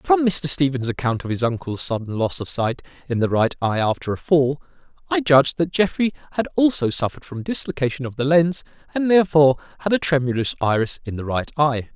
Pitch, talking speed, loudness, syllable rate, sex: 140 Hz, 205 wpm, -20 LUFS, 6.0 syllables/s, male